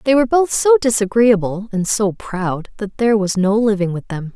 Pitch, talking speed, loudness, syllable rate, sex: 215 Hz, 205 wpm, -16 LUFS, 5.2 syllables/s, female